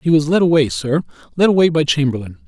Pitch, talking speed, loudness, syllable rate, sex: 150 Hz, 220 wpm, -16 LUFS, 6.9 syllables/s, male